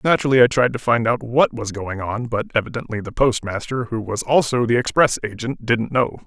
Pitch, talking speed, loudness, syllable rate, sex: 120 Hz, 210 wpm, -20 LUFS, 5.6 syllables/s, male